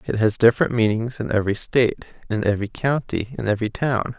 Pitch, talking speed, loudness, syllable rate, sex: 115 Hz, 185 wpm, -21 LUFS, 6.3 syllables/s, male